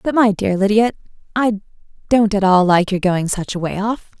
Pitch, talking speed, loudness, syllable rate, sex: 205 Hz, 215 wpm, -17 LUFS, 5.1 syllables/s, female